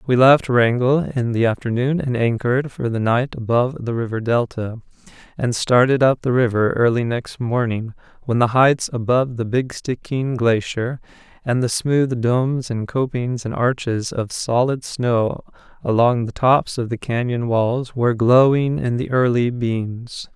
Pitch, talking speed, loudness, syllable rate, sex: 120 Hz, 160 wpm, -19 LUFS, 4.4 syllables/s, male